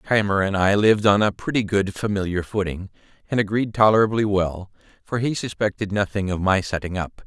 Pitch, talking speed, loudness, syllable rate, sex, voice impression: 100 Hz, 180 wpm, -21 LUFS, 5.4 syllables/s, male, very masculine, adult-like, slightly fluent, slightly cool, sincere, slightly unique